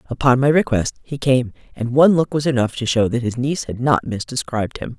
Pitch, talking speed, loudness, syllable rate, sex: 125 Hz, 230 wpm, -19 LUFS, 6.0 syllables/s, female